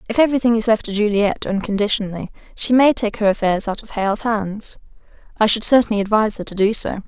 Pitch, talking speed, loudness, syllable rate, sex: 215 Hz, 205 wpm, -18 LUFS, 6.4 syllables/s, female